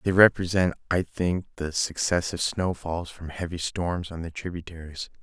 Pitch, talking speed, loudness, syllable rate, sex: 85 Hz, 150 wpm, -26 LUFS, 4.8 syllables/s, male